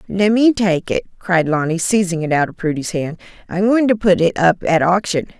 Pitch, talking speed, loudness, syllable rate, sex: 185 Hz, 225 wpm, -16 LUFS, 5.0 syllables/s, female